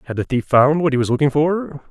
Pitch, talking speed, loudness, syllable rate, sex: 145 Hz, 285 wpm, -17 LUFS, 6.0 syllables/s, male